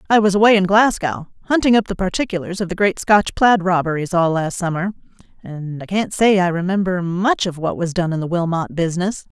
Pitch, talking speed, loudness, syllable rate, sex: 185 Hz, 210 wpm, -18 LUFS, 5.6 syllables/s, female